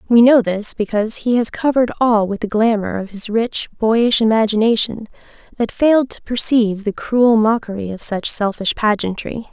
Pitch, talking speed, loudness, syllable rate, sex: 220 Hz, 170 wpm, -16 LUFS, 5.0 syllables/s, female